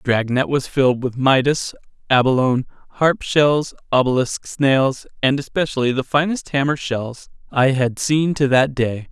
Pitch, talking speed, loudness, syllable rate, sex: 135 Hz, 150 wpm, -18 LUFS, 4.6 syllables/s, male